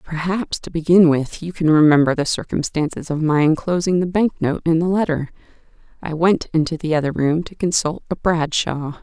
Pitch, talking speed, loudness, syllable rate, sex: 165 Hz, 185 wpm, -18 LUFS, 5.2 syllables/s, female